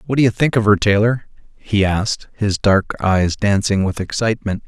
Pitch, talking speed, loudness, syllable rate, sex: 105 Hz, 195 wpm, -17 LUFS, 5.1 syllables/s, male